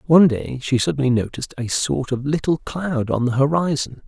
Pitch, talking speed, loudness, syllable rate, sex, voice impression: 135 Hz, 190 wpm, -20 LUFS, 5.5 syllables/s, male, very masculine, slightly old, very thick, tensed, slightly weak, slightly dark, slightly hard, fluent, slightly raspy, slightly cool, intellectual, refreshing, slightly sincere, calm, slightly friendly, slightly reassuring, unique, slightly elegant, wild, slightly sweet, slightly lively, kind, modest